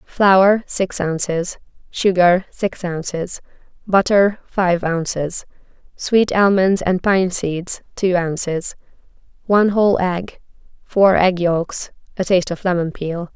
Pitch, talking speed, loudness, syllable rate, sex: 185 Hz, 120 wpm, -18 LUFS, 3.7 syllables/s, female